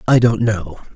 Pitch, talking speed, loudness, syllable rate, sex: 110 Hz, 190 wpm, -16 LUFS, 4.4 syllables/s, male